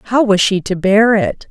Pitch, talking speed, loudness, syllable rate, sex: 205 Hz, 240 wpm, -13 LUFS, 4.1 syllables/s, female